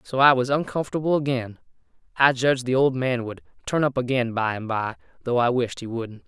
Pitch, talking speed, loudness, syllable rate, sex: 125 Hz, 210 wpm, -23 LUFS, 5.7 syllables/s, male